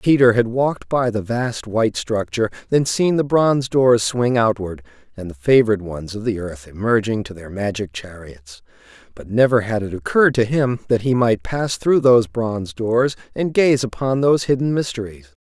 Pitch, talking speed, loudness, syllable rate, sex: 115 Hz, 185 wpm, -18 LUFS, 5.1 syllables/s, male